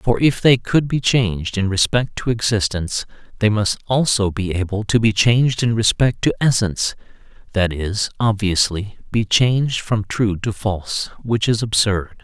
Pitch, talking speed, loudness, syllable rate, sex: 105 Hz, 160 wpm, -18 LUFS, 4.7 syllables/s, male